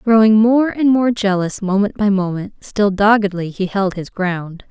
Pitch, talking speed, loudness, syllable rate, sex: 205 Hz, 180 wpm, -16 LUFS, 4.4 syllables/s, female